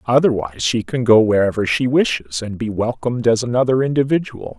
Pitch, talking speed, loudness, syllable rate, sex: 120 Hz, 170 wpm, -17 LUFS, 5.8 syllables/s, male